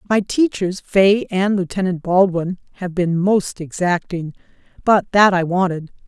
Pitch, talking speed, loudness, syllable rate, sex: 185 Hz, 140 wpm, -18 LUFS, 4.2 syllables/s, female